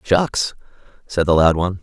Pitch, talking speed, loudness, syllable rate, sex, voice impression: 90 Hz, 165 wpm, -18 LUFS, 5.0 syllables/s, male, masculine, adult-like, tensed, powerful, clear, fluent, cool, intellectual, friendly, wild, lively